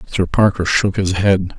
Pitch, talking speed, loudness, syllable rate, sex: 95 Hz, 190 wpm, -16 LUFS, 4.4 syllables/s, male